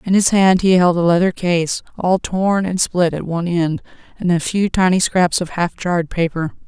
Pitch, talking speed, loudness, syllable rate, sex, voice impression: 175 Hz, 215 wpm, -17 LUFS, 4.9 syllables/s, female, feminine, adult-like, fluent, slightly refreshing, friendly, slightly elegant